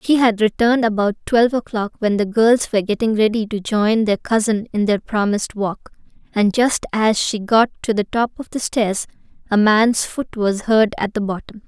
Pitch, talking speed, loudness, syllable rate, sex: 215 Hz, 200 wpm, -18 LUFS, 5.0 syllables/s, female